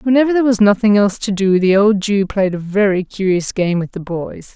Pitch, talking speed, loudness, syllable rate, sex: 200 Hz, 235 wpm, -15 LUFS, 5.6 syllables/s, female